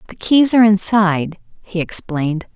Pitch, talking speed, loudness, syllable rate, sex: 195 Hz, 140 wpm, -15 LUFS, 5.2 syllables/s, female